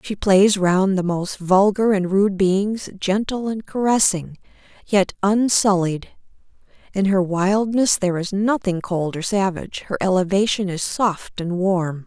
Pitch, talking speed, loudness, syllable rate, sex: 195 Hz, 145 wpm, -19 LUFS, 4.2 syllables/s, female